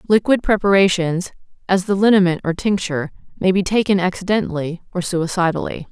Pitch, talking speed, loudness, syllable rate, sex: 185 Hz, 130 wpm, -18 LUFS, 5.9 syllables/s, female